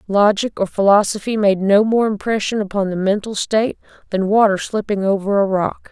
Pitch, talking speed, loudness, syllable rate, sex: 205 Hz, 170 wpm, -17 LUFS, 5.4 syllables/s, female